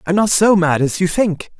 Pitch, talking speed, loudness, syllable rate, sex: 185 Hz, 265 wpm, -15 LUFS, 4.9 syllables/s, male